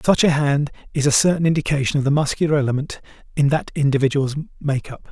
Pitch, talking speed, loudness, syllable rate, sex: 145 Hz, 175 wpm, -19 LUFS, 6.5 syllables/s, male